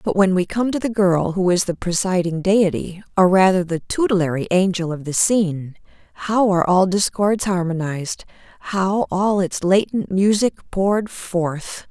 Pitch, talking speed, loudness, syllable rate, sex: 185 Hz, 160 wpm, -19 LUFS, 4.6 syllables/s, female